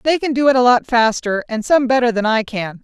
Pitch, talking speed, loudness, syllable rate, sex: 240 Hz, 275 wpm, -16 LUFS, 5.6 syllables/s, female